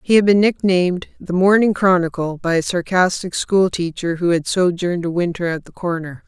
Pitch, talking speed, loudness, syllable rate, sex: 180 Hz, 180 wpm, -18 LUFS, 5.3 syllables/s, female